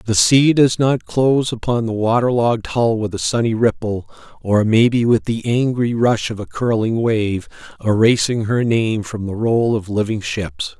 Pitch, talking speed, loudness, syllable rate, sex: 115 Hz, 185 wpm, -17 LUFS, 4.5 syllables/s, male